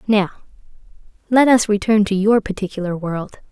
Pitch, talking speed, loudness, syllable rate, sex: 205 Hz, 135 wpm, -17 LUFS, 5.5 syllables/s, female